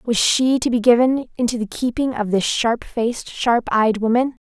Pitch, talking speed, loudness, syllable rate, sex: 235 Hz, 200 wpm, -19 LUFS, 4.8 syllables/s, female